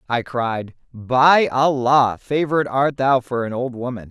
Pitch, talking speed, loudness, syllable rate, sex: 130 Hz, 160 wpm, -19 LUFS, 4.0 syllables/s, male